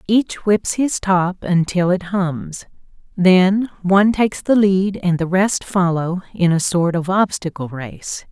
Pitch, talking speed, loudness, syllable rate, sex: 185 Hz, 160 wpm, -17 LUFS, 3.8 syllables/s, female